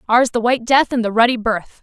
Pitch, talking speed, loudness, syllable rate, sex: 235 Hz, 265 wpm, -16 LUFS, 6.1 syllables/s, female